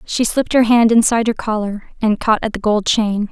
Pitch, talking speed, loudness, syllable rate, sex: 220 Hz, 235 wpm, -16 LUFS, 5.6 syllables/s, female